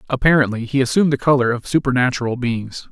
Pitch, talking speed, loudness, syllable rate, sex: 130 Hz, 165 wpm, -18 LUFS, 6.6 syllables/s, male